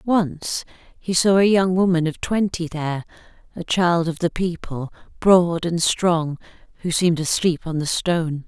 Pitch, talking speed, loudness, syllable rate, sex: 170 Hz, 165 wpm, -20 LUFS, 4.4 syllables/s, female